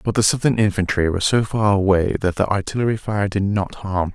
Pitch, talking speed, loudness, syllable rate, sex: 100 Hz, 215 wpm, -19 LUFS, 5.8 syllables/s, male